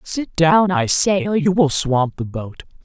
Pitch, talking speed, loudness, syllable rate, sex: 175 Hz, 210 wpm, -17 LUFS, 3.9 syllables/s, female